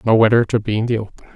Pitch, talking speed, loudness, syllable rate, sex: 110 Hz, 310 wpm, -17 LUFS, 8.4 syllables/s, male